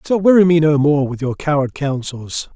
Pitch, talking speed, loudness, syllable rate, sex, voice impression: 150 Hz, 210 wpm, -16 LUFS, 4.9 syllables/s, male, masculine, adult-like, sincere, reassuring